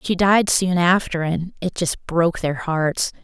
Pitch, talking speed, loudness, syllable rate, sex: 175 Hz, 185 wpm, -20 LUFS, 4.0 syllables/s, female